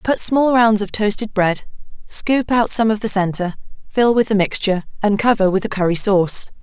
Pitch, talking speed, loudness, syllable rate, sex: 210 Hz, 200 wpm, -17 LUFS, 5.1 syllables/s, female